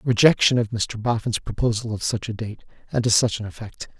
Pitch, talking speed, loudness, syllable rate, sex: 110 Hz, 210 wpm, -22 LUFS, 5.6 syllables/s, male